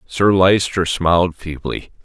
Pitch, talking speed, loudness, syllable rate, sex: 90 Hz, 120 wpm, -16 LUFS, 3.9 syllables/s, male